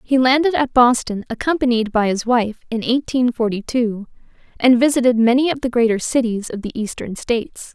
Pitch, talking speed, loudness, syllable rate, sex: 240 Hz, 180 wpm, -18 LUFS, 5.3 syllables/s, female